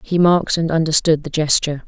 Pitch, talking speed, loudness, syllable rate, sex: 160 Hz, 195 wpm, -16 LUFS, 6.2 syllables/s, female